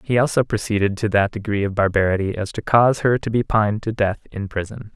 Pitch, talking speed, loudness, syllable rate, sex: 105 Hz, 230 wpm, -20 LUFS, 6.0 syllables/s, male